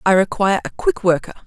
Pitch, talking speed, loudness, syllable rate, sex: 205 Hz, 205 wpm, -18 LUFS, 6.6 syllables/s, female